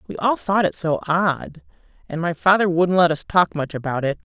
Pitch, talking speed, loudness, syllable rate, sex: 175 Hz, 225 wpm, -20 LUFS, 5.0 syllables/s, female